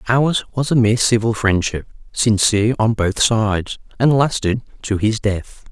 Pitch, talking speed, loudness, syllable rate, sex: 110 Hz, 160 wpm, -17 LUFS, 4.7 syllables/s, male